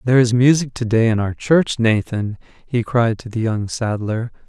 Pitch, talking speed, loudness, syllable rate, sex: 115 Hz, 200 wpm, -18 LUFS, 4.7 syllables/s, male